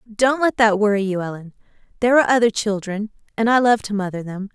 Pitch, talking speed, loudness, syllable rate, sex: 215 Hz, 210 wpm, -19 LUFS, 6.3 syllables/s, female